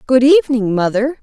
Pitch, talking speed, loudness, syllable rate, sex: 250 Hz, 145 wpm, -13 LUFS, 5.4 syllables/s, female